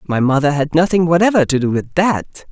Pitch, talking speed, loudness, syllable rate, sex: 155 Hz, 215 wpm, -15 LUFS, 5.5 syllables/s, male